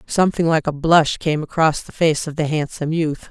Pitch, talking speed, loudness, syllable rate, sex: 155 Hz, 220 wpm, -19 LUFS, 5.4 syllables/s, female